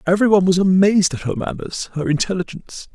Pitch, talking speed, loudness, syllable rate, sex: 185 Hz, 185 wpm, -18 LUFS, 7.0 syllables/s, male